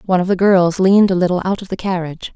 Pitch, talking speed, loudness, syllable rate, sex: 185 Hz, 280 wpm, -15 LUFS, 7.2 syllables/s, female